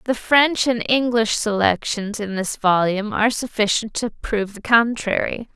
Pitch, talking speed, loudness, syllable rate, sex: 220 Hz, 150 wpm, -19 LUFS, 4.7 syllables/s, female